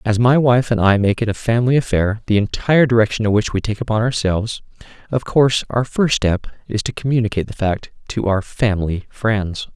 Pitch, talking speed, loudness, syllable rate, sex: 110 Hz, 205 wpm, -18 LUFS, 5.8 syllables/s, male